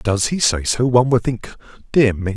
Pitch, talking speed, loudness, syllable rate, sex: 115 Hz, 205 wpm, -17 LUFS, 5.1 syllables/s, male